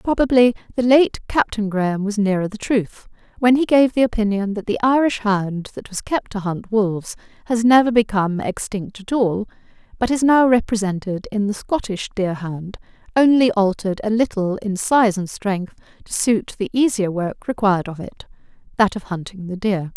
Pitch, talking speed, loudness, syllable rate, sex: 215 Hz, 175 wpm, -19 LUFS, 5.1 syllables/s, female